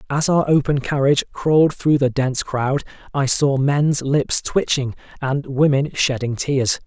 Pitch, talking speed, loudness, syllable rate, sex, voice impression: 140 Hz, 155 wpm, -19 LUFS, 4.4 syllables/s, male, very masculine, very adult-like, slightly old, thick, slightly relaxed, slightly weak, slightly dark, slightly soft, slightly clear, fluent, cool, intellectual, very sincere, calm, reassuring, slightly elegant, slightly sweet, kind, slightly modest